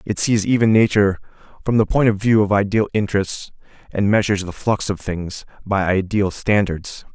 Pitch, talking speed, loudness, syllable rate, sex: 100 Hz, 175 wpm, -19 LUFS, 5.3 syllables/s, male